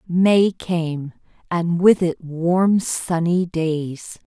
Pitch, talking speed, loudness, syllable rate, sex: 170 Hz, 110 wpm, -19 LUFS, 2.5 syllables/s, female